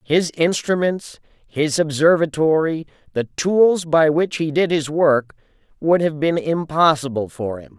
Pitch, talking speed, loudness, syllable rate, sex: 155 Hz, 125 wpm, -19 LUFS, 4.0 syllables/s, male